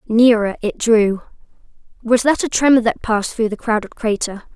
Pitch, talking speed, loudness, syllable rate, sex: 225 Hz, 170 wpm, -17 LUFS, 5.1 syllables/s, female